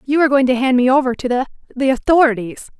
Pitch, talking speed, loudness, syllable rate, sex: 255 Hz, 215 wpm, -15 LUFS, 6.7 syllables/s, female